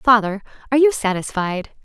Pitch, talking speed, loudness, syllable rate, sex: 225 Hz, 130 wpm, -19 LUFS, 5.6 syllables/s, female